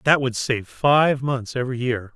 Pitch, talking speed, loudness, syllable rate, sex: 125 Hz, 195 wpm, -21 LUFS, 4.4 syllables/s, male